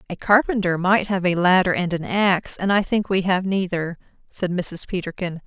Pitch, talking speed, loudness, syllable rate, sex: 185 Hz, 200 wpm, -21 LUFS, 5.1 syllables/s, female